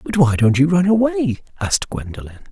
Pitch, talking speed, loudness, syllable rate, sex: 140 Hz, 190 wpm, -17 LUFS, 5.8 syllables/s, male